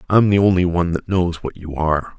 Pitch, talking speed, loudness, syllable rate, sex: 90 Hz, 245 wpm, -18 LUFS, 6.0 syllables/s, male